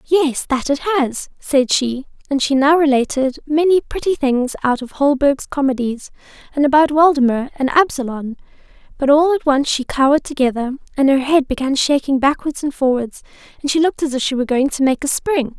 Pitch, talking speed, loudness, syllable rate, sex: 280 Hz, 185 wpm, -17 LUFS, 5.3 syllables/s, female